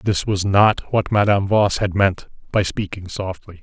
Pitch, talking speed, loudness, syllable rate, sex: 100 Hz, 180 wpm, -19 LUFS, 4.5 syllables/s, male